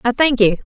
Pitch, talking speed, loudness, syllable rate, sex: 240 Hz, 255 wpm, -15 LUFS, 6.1 syllables/s, female